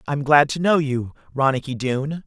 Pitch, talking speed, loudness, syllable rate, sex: 140 Hz, 185 wpm, -20 LUFS, 5.1 syllables/s, male